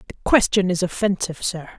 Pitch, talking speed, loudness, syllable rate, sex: 185 Hz, 170 wpm, -20 LUFS, 6.3 syllables/s, female